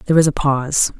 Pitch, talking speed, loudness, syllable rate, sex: 145 Hz, 240 wpm, -17 LUFS, 6.5 syllables/s, female